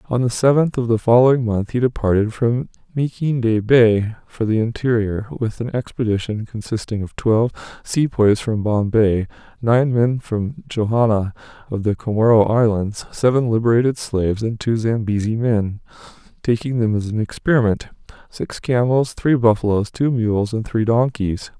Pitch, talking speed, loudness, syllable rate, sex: 115 Hz, 145 wpm, -19 LUFS, 4.9 syllables/s, male